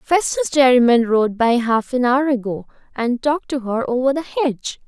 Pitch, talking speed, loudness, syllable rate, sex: 255 Hz, 185 wpm, -18 LUFS, 4.9 syllables/s, female